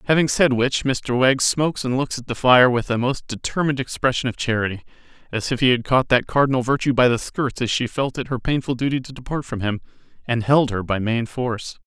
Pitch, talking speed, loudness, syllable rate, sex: 125 Hz, 235 wpm, -20 LUFS, 5.8 syllables/s, male